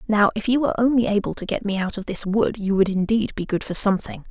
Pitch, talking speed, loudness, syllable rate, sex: 205 Hz, 280 wpm, -21 LUFS, 6.5 syllables/s, female